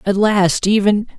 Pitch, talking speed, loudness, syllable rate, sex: 200 Hz, 150 wpm, -15 LUFS, 4.0 syllables/s, male